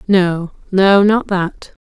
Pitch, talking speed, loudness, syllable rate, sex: 190 Hz, 130 wpm, -15 LUFS, 2.8 syllables/s, female